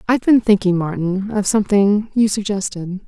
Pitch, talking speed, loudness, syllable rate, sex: 200 Hz, 155 wpm, -17 LUFS, 5.3 syllables/s, female